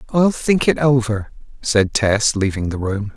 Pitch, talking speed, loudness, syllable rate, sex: 115 Hz, 170 wpm, -18 LUFS, 4.1 syllables/s, male